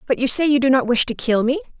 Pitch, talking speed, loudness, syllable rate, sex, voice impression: 250 Hz, 335 wpm, -17 LUFS, 6.8 syllables/s, female, feminine, adult-like, slightly fluent, slightly calm, elegant, slightly sweet